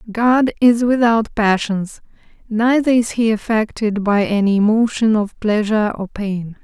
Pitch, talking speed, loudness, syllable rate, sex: 220 Hz, 135 wpm, -16 LUFS, 4.3 syllables/s, female